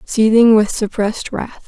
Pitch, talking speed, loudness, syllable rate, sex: 220 Hz, 145 wpm, -14 LUFS, 4.5 syllables/s, female